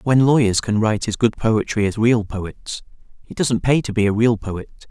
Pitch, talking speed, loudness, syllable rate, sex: 110 Hz, 220 wpm, -19 LUFS, 5.0 syllables/s, male